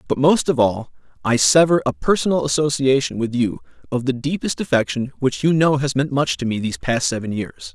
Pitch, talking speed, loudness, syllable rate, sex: 135 Hz, 210 wpm, -19 LUFS, 5.5 syllables/s, male